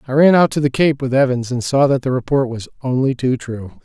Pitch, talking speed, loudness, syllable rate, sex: 130 Hz, 265 wpm, -17 LUFS, 5.8 syllables/s, male